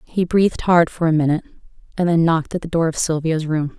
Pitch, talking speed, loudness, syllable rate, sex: 165 Hz, 240 wpm, -18 LUFS, 6.3 syllables/s, female